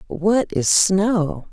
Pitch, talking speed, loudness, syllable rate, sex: 190 Hz, 120 wpm, -18 LUFS, 2.3 syllables/s, female